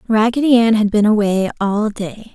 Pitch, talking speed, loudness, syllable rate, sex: 215 Hz, 180 wpm, -15 LUFS, 4.8 syllables/s, female